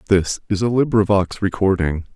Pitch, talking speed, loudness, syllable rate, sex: 100 Hz, 140 wpm, -19 LUFS, 5.1 syllables/s, male